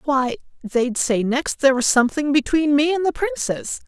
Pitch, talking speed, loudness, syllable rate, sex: 275 Hz, 185 wpm, -20 LUFS, 4.9 syllables/s, female